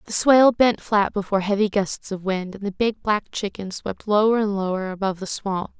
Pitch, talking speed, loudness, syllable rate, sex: 200 Hz, 215 wpm, -22 LUFS, 5.4 syllables/s, female